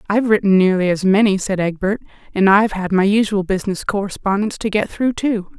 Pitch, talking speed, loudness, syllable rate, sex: 200 Hz, 195 wpm, -17 LUFS, 6.2 syllables/s, female